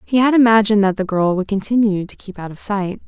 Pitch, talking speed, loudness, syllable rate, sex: 205 Hz, 255 wpm, -16 LUFS, 6.1 syllables/s, female